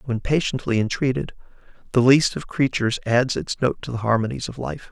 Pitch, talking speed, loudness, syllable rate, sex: 120 Hz, 185 wpm, -22 LUFS, 5.5 syllables/s, male